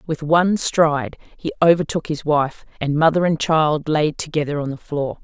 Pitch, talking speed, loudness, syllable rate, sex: 155 Hz, 185 wpm, -19 LUFS, 5.0 syllables/s, female